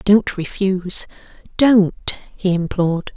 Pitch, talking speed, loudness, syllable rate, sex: 190 Hz, 95 wpm, -18 LUFS, 4.0 syllables/s, female